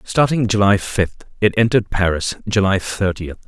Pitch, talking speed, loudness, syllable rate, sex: 100 Hz, 140 wpm, -18 LUFS, 5.0 syllables/s, male